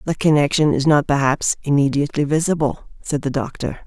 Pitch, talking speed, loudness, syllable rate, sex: 140 Hz, 155 wpm, -18 LUFS, 5.9 syllables/s, male